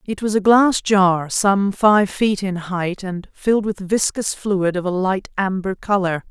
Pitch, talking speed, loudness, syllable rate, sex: 195 Hz, 190 wpm, -18 LUFS, 4.0 syllables/s, female